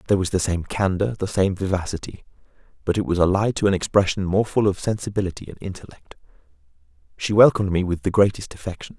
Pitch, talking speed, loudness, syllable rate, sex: 95 Hz, 185 wpm, -22 LUFS, 6.5 syllables/s, male